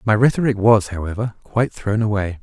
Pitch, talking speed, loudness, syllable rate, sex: 110 Hz, 175 wpm, -19 LUFS, 5.8 syllables/s, male